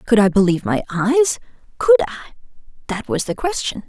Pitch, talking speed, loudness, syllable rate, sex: 225 Hz, 140 wpm, -18 LUFS, 6.1 syllables/s, female